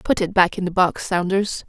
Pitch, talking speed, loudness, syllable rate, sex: 185 Hz, 250 wpm, -20 LUFS, 5.1 syllables/s, female